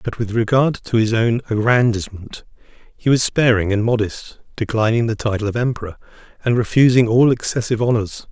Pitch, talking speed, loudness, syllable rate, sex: 115 Hz, 160 wpm, -17 LUFS, 5.7 syllables/s, male